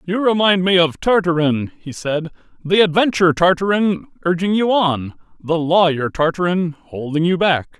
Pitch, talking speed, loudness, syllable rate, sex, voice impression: 175 Hz, 145 wpm, -17 LUFS, 4.8 syllables/s, male, slightly masculine, adult-like, tensed, clear, refreshing, friendly, lively